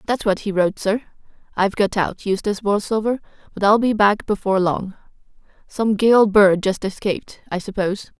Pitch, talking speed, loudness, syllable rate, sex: 205 Hz, 170 wpm, -19 LUFS, 5.5 syllables/s, female